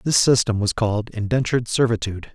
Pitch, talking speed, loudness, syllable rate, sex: 115 Hz, 155 wpm, -20 LUFS, 6.3 syllables/s, male